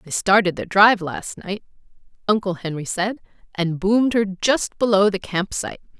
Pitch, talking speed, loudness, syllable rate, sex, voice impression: 200 Hz, 160 wpm, -20 LUFS, 5.0 syllables/s, female, feminine, middle-aged, tensed, powerful, bright, clear, fluent, intellectual, friendly, lively, slightly sharp